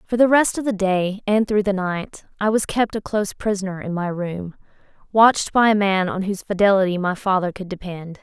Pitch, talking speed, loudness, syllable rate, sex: 195 Hz, 220 wpm, -20 LUFS, 5.5 syllables/s, female